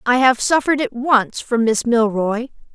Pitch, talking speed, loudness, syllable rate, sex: 240 Hz, 175 wpm, -17 LUFS, 4.6 syllables/s, female